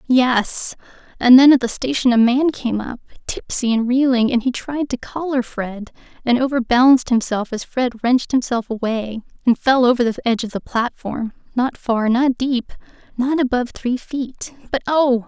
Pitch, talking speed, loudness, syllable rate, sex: 245 Hz, 175 wpm, -18 LUFS, 4.8 syllables/s, female